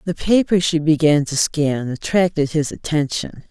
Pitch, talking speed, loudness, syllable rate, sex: 155 Hz, 155 wpm, -18 LUFS, 4.5 syllables/s, female